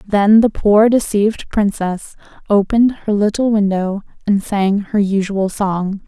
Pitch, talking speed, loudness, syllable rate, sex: 205 Hz, 140 wpm, -15 LUFS, 4.2 syllables/s, female